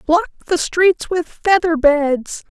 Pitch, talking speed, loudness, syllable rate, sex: 335 Hz, 140 wpm, -16 LUFS, 3.3 syllables/s, female